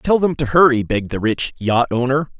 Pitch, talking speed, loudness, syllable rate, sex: 130 Hz, 225 wpm, -17 LUFS, 5.5 syllables/s, male